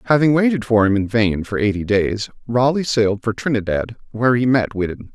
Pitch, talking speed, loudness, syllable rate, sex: 115 Hz, 200 wpm, -18 LUFS, 5.6 syllables/s, male